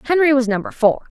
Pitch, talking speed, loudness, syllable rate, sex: 265 Hz, 200 wpm, -17 LUFS, 6.4 syllables/s, female